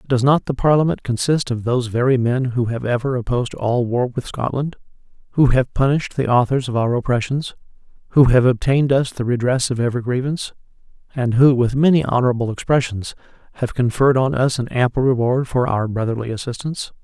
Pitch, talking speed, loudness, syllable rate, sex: 125 Hz, 180 wpm, -18 LUFS, 6.0 syllables/s, male